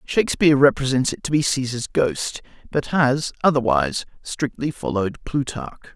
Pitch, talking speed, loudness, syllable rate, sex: 140 Hz, 130 wpm, -21 LUFS, 5.0 syllables/s, male